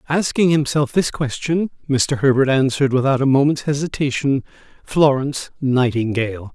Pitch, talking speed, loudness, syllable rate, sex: 140 Hz, 120 wpm, -18 LUFS, 5.1 syllables/s, male